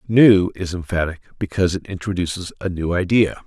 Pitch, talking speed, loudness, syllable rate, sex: 90 Hz, 155 wpm, -20 LUFS, 5.6 syllables/s, male